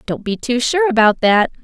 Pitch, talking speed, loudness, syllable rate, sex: 245 Hz, 220 wpm, -15 LUFS, 4.9 syllables/s, female